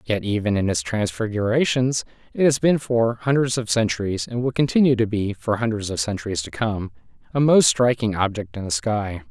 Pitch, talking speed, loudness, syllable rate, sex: 110 Hz, 195 wpm, -21 LUFS, 5.3 syllables/s, male